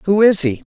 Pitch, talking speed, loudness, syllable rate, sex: 185 Hz, 255 wpm, -14 LUFS, 4.9 syllables/s, male